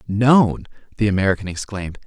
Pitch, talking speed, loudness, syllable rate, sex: 105 Hz, 115 wpm, -19 LUFS, 5.8 syllables/s, male